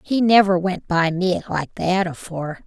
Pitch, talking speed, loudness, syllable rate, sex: 180 Hz, 180 wpm, -20 LUFS, 4.5 syllables/s, female